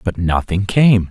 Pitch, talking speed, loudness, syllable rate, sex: 100 Hz, 165 wpm, -16 LUFS, 4.0 syllables/s, male